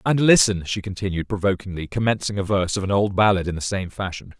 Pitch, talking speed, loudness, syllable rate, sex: 100 Hz, 220 wpm, -21 LUFS, 6.3 syllables/s, male